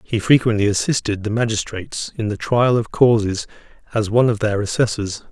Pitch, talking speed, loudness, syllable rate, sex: 110 Hz, 170 wpm, -19 LUFS, 5.5 syllables/s, male